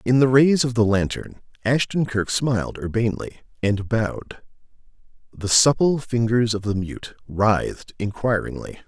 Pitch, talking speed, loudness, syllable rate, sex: 115 Hz, 135 wpm, -21 LUFS, 4.6 syllables/s, male